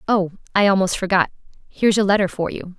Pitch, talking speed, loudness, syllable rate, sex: 195 Hz, 170 wpm, -19 LUFS, 6.5 syllables/s, female